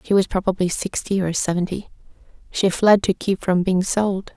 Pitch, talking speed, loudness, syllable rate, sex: 190 Hz, 180 wpm, -20 LUFS, 5.0 syllables/s, female